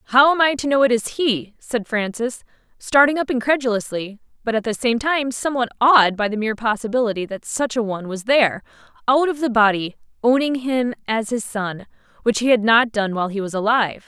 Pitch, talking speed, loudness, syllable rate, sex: 235 Hz, 205 wpm, -19 LUFS, 5.6 syllables/s, female